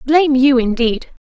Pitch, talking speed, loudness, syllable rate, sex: 265 Hz, 135 wpm, -14 LUFS, 4.7 syllables/s, female